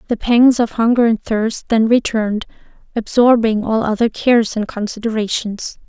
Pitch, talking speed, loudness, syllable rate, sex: 225 Hz, 145 wpm, -16 LUFS, 4.9 syllables/s, female